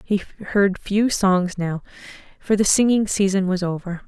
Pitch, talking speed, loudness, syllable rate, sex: 195 Hz, 160 wpm, -20 LUFS, 4.1 syllables/s, female